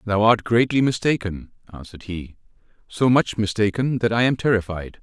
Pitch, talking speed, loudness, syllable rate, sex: 110 Hz, 155 wpm, -20 LUFS, 5.2 syllables/s, male